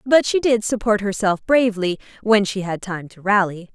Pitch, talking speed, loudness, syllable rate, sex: 205 Hz, 190 wpm, -19 LUFS, 5.0 syllables/s, female